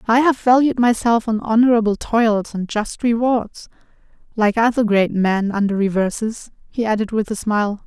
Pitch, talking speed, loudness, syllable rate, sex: 220 Hz, 160 wpm, -18 LUFS, 4.9 syllables/s, female